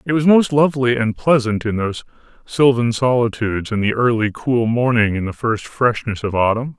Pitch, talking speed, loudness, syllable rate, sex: 120 Hz, 185 wpm, -17 LUFS, 5.3 syllables/s, male